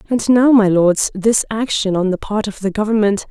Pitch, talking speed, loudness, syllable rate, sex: 210 Hz, 220 wpm, -15 LUFS, 4.9 syllables/s, female